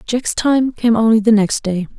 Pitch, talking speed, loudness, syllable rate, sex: 225 Hz, 210 wpm, -15 LUFS, 4.6 syllables/s, female